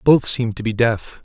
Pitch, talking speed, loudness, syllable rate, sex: 115 Hz, 240 wpm, -18 LUFS, 5.3 syllables/s, male